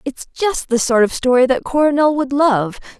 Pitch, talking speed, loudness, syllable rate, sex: 265 Hz, 200 wpm, -16 LUFS, 4.9 syllables/s, female